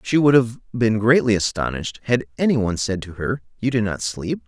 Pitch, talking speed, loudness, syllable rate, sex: 110 Hz, 215 wpm, -20 LUFS, 5.7 syllables/s, male